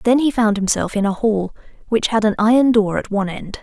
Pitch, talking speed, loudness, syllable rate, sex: 220 Hz, 250 wpm, -17 LUFS, 5.8 syllables/s, female